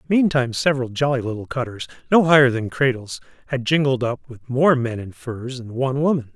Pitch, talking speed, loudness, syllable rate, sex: 130 Hz, 190 wpm, -20 LUFS, 5.7 syllables/s, male